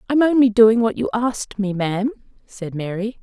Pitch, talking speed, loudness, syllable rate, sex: 220 Hz, 205 wpm, -19 LUFS, 5.7 syllables/s, female